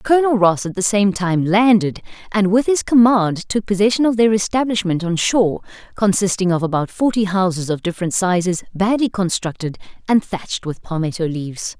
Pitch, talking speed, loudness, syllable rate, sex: 195 Hz, 170 wpm, -17 LUFS, 5.3 syllables/s, female